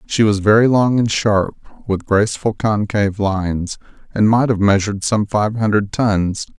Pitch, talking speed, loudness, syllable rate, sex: 105 Hz, 165 wpm, -16 LUFS, 4.8 syllables/s, male